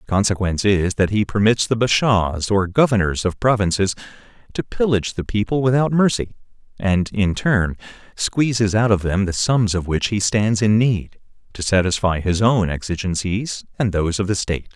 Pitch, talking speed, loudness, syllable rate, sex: 105 Hz, 175 wpm, -19 LUFS, 5.2 syllables/s, male